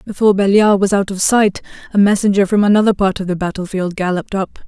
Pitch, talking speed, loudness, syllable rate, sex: 195 Hz, 205 wpm, -15 LUFS, 6.3 syllables/s, female